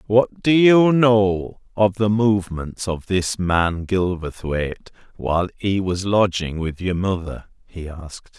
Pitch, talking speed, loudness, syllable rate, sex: 95 Hz, 145 wpm, -20 LUFS, 3.8 syllables/s, male